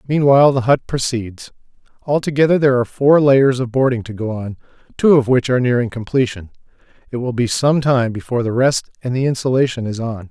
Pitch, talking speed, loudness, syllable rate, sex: 125 Hz, 190 wpm, -16 LUFS, 6.0 syllables/s, male